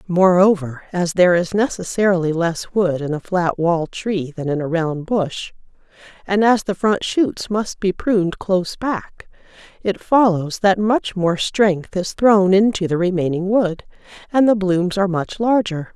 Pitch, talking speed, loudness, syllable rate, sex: 190 Hz, 170 wpm, -18 LUFS, 4.3 syllables/s, female